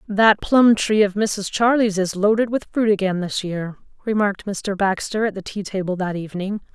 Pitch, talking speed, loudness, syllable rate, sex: 200 Hz, 195 wpm, -20 LUFS, 5.1 syllables/s, female